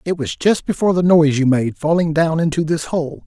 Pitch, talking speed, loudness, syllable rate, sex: 160 Hz, 240 wpm, -17 LUFS, 5.7 syllables/s, male